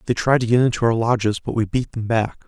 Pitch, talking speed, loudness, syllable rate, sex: 115 Hz, 290 wpm, -20 LUFS, 6.1 syllables/s, male